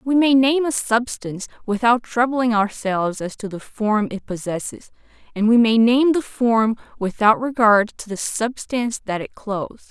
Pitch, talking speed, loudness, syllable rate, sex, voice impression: 225 Hz, 170 wpm, -19 LUFS, 4.6 syllables/s, female, very feminine, slightly young, thin, tensed, slightly powerful, very bright, slightly hard, very clear, very fluent, cool, very intellectual, very refreshing, sincere, very calm, very friendly, very reassuring, unique, very elegant, slightly wild, sweet, very lively, very kind, slightly intense, slightly sharp